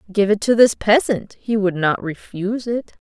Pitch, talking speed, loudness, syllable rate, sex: 210 Hz, 195 wpm, -19 LUFS, 4.9 syllables/s, female